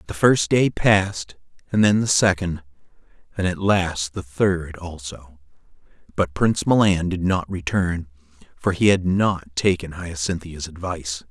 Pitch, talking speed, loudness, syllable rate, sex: 90 Hz, 145 wpm, -21 LUFS, 4.3 syllables/s, male